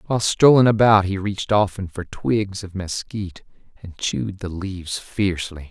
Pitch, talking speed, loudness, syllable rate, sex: 95 Hz, 160 wpm, -20 LUFS, 5.0 syllables/s, male